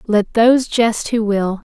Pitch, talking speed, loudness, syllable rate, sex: 220 Hz, 175 wpm, -16 LUFS, 3.9 syllables/s, female